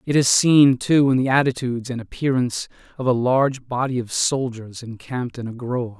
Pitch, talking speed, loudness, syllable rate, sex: 125 Hz, 190 wpm, -20 LUFS, 5.6 syllables/s, male